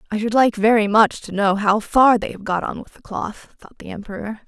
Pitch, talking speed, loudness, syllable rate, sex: 215 Hz, 255 wpm, -18 LUFS, 5.3 syllables/s, female